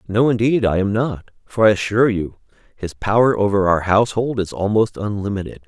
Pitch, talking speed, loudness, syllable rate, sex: 105 Hz, 180 wpm, -18 LUFS, 5.6 syllables/s, male